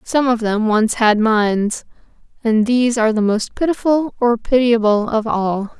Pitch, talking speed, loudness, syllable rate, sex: 230 Hz, 155 wpm, -16 LUFS, 4.4 syllables/s, female